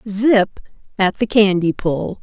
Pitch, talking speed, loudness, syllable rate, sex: 200 Hz, 135 wpm, -17 LUFS, 3.6 syllables/s, female